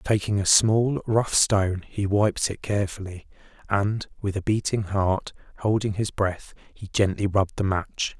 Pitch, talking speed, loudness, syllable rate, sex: 100 Hz, 160 wpm, -24 LUFS, 4.4 syllables/s, male